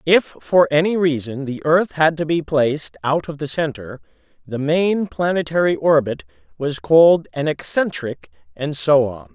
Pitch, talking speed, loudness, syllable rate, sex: 150 Hz, 160 wpm, -18 LUFS, 4.5 syllables/s, male